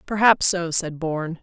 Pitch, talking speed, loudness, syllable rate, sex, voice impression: 170 Hz, 170 wpm, -20 LUFS, 4.7 syllables/s, female, feminine, very adult-like, intellectual, slightly unique, slightly sharp